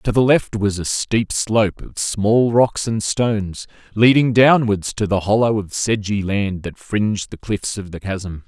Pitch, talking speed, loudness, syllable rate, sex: 105 Hz, 190 wpm, -18 LUFS, 4.2 syllables/s, male